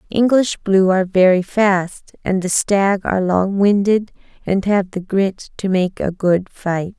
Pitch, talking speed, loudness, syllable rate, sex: 195 Hz, 170 wpm, -17 LUFS, 3.9 syllables/s, female